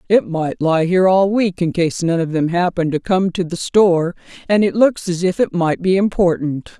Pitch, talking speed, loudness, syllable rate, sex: 180 Hz, 230 wpm, -17 LUFS, 5.2 syllables/s, female